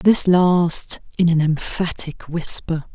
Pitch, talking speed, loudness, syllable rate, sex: 170 Hz, 120 wpm, -19 LUFS, 3.4 syllables/s, female